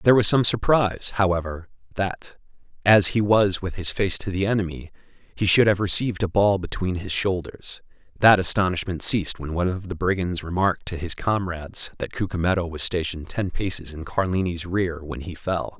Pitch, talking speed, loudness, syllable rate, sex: 90 Hz, 180 wpm, -23 LUFS, 5.4 syllables/s, male